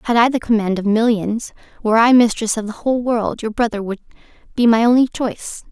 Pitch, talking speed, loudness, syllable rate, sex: 225 Hz, 210 wpm, -17 LUFS, 6.1 syllables/s, female